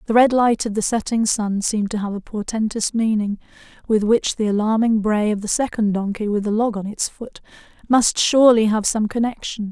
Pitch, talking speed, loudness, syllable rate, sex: 215 Hz, 205 wpm, -19 LUFS, 5.3 syllables/s, female